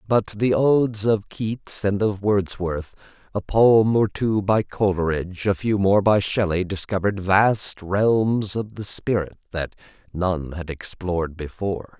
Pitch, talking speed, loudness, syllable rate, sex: 100 Hz, 150 wpm, -22 LUFS, 4.0 syllables/s, male